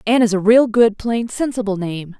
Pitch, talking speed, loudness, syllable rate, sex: 220 Hz, 220 wpm, -17 LUFS, 5.3 syllables/s, female